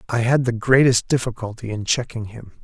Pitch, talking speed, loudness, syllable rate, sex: 115 Hz, 180 wpm, -20 LUFS, 5.5 syllables/s, male